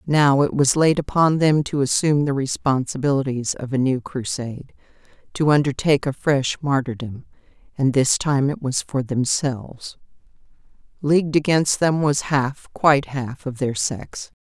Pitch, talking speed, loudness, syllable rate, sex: 140 Hz, 140 wpm, -20 LUFS, 4.7 syllables/s, female